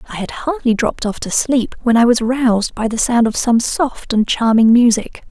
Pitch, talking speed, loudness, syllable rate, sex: 235 Hz, 225 wpm, -15 LUFS, 5.1 syllables/s, female